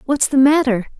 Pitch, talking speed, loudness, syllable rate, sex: 265 Hz, 240 wpm, -15 LUFS, 6.7 syllables/s, female